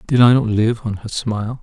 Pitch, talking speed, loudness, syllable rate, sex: 115 Hz, 260 wpm, -17 LUFS, 5.4 syllables/s, male